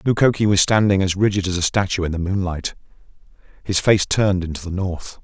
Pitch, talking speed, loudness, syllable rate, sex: 95 Hz, 195 wpm, -19 LUFS, 6.0 syllables/s, male